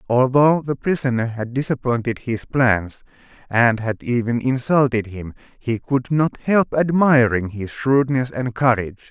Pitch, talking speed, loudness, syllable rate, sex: 125 Hz, 140 wpm, -19 LUFS, 4.2 syllables/s, male